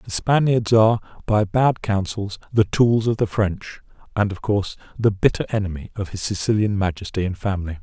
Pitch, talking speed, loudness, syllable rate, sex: 105 Hz, 175 wpm, -21 LUFS, 5.4 syllables/s, male